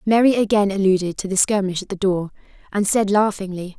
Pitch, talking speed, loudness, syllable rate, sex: 200 Hz, 190 wpm, -19 LUFS, 5.8 syllables/s, female